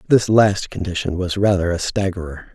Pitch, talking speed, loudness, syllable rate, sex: 95 Hz, 165 wpm, -19 LUFS, 5.2 syllables/s, male